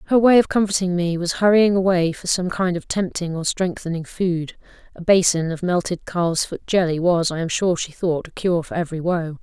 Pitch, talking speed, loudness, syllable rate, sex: 175 Hz, 210 wpm, -20 LUFS, 5.4 syllables/s, female